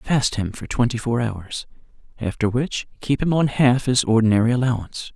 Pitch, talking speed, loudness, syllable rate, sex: 120 Hz, 175 wpm, -21 LUFS, 5.2 syllables/s, male